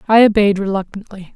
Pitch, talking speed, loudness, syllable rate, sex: 200 Hz, 135 wpm, -14 LUFS, 6.0 syllables/s, female